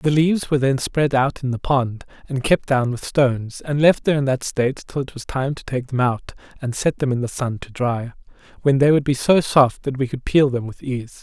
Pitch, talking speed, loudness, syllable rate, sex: 135 Hz, 260 wpm, -20 LUFS, 5.3 syllables/s, male